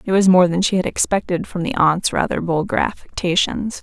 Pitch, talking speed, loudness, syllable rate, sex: 180 Hz, 205 wpm, -18 LUFS, 5.4 syllables/s, female